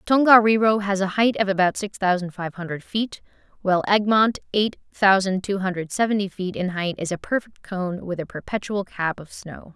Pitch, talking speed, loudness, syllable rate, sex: 195 Hz, 190 wpm, -22 LUFS, 5.2 syllables/s, female